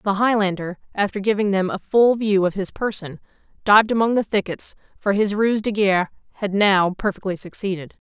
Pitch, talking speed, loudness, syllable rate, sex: 200 Hz, 180 wpm, -20 LUFS, 5.5 syllables/s, female